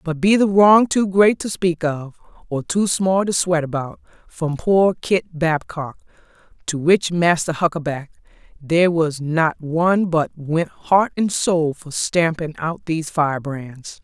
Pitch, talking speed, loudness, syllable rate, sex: 170 Hz, 160 wpm, -19 LUFS, 4.0 syllables/s, female